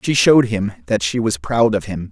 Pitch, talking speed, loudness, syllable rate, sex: 105 Hz, 255 wpm, -17 LUFS, 5.4 syllables/s, male